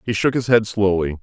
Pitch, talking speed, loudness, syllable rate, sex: 105 Hz, 245 wpm, -18 LUFS, 5.6 syllables/s, male